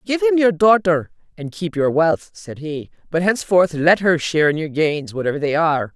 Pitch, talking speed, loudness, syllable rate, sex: 170 Hz, 210 wpm, -18 LUFS, 5.4 syllables/s, female